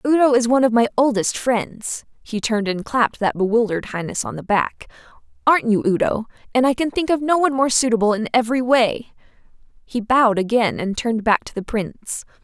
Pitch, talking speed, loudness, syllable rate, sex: 230 Hz, 190 wpm, -19 LUFS, 6.1 syllables/s, female